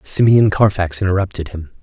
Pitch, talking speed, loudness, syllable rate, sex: 95 Hz, 130 wpm, -15 LUFS, 5.5 syllables/s, male